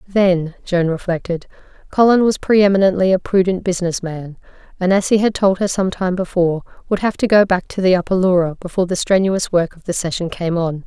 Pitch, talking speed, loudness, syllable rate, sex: 185 Hz, 210 wpm, -17 LUFS, 5.8 syllables/s, female